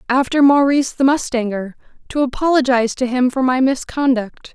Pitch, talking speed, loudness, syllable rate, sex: 260 Hz, 130 wpm, -16 LUFS, 5.5 syllables/s, female